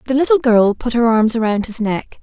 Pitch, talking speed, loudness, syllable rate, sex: 235 Hz, 245 wpm, -15 LUFS, 5.4 syllables/s, female